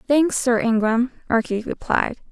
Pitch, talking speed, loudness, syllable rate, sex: 240 Hz, 130 wpm, -21 LUFS, 4.4 syllables/s, female